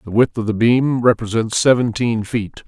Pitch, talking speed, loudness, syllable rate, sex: 115 Hz, 180 wpm, -17 LUFS, 4.9 syllables/s, male